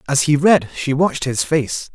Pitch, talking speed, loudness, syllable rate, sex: 140 Hz, 215 wpm, -17 LUFS, 4.7 syllables/s, male